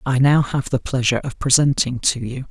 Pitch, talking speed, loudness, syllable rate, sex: 130 Hz, 215 wpm, -18 LUFS, 5.4 syllables/s, male